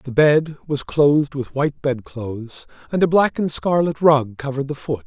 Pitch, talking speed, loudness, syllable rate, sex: 145 Hz, 190 wpm, -19 LUFS, 4.9 syllables/s, male